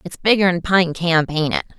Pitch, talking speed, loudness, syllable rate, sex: 175 Hz, 200 wpm, -17 LUFS, 4.4 syllables/s, female